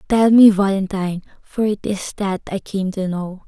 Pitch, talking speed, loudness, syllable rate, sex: 195 Hz, 190 wpm, -18 LUFS, 4.7 syllables/s, female